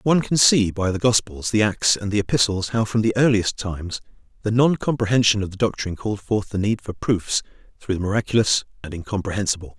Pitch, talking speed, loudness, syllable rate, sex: 105 Hz, 200 wpm, -21 LUFS, 6.1 syllables/s, male